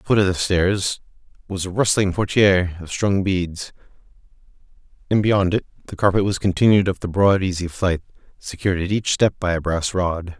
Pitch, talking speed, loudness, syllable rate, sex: 95 Hz, 190 wpm, -20 LUFS, 5.4 syllables/s, male